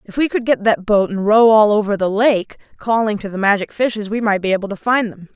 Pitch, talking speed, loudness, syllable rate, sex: 210 Hz, 270 wpm, -16 LUFS, 5.8 syllables/s, female